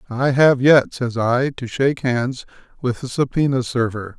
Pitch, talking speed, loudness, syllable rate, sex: 130 Hz, 170 wpm, -19 LUFS, 4.4 syllables/s, male